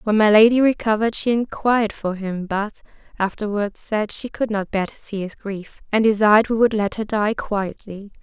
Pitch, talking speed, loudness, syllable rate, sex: 210 Hz, 195 wpm, -20 LUFS, 5.1 syllables/s, female